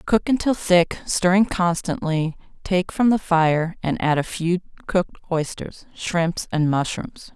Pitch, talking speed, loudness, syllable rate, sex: 175 Hz, 145 wpm, -21 LUFS, 4.0 syllables/s, female